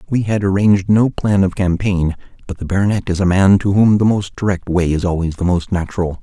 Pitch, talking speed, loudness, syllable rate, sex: 95 Hz, 230 wpm, -16 LUFS, 5.9 syllables/s, male